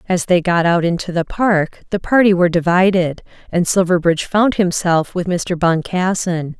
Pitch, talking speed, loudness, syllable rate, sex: 180 Hz, 165 wpm, -16 LUFS, 4.8 syllables/s, female